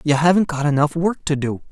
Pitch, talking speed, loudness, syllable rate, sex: 155 Hz, 245 wpm, -19 LUFS, 5.8 syllables/s, male